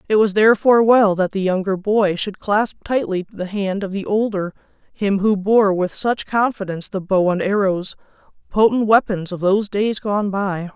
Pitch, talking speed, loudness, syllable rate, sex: 200 Hz, 185 wpm, -18 LUFS, 4.8 syllables/s, female